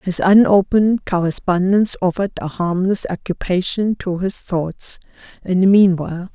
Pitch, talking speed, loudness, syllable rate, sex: 185 Hz, 125 wpm, -17 LUFS, 5.0 syllables/s, female